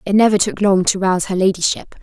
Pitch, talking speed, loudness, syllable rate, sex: 190 Hz, 235 wpm, -16 LUFS, 6.3 syllables/s, female